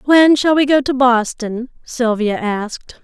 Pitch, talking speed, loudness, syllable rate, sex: 250 Hz, 160 wpm, -15 LUFS, 3.9 syllables/s, female